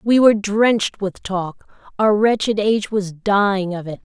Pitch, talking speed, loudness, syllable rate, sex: 205 Hz, 160 wpm, -18 LUFS, 4.7 syllables/s, female